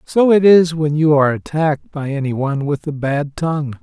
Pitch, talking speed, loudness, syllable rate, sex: 150 Hz, 205 wpm, -16 LUFS, 5.1 syllables/s, male